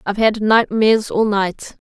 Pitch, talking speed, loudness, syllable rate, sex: 210 Hz, 160 wpm, -16 LUFS, 5.2 syllables/s, female